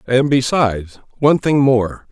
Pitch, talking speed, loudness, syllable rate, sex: 125 Hz, 115 wpm, -15 LUFS, 4.6 syllables/s, male